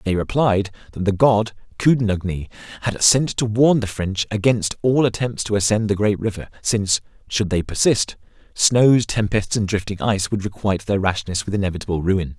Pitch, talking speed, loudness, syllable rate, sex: 105 Hz, 175 wpm, -20 LUFS, 5.3 syllables/s, male